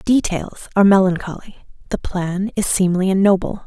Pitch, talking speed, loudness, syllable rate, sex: 190 Hz, 145 wpm, -18 LUFS, 5.2 syllables/s, female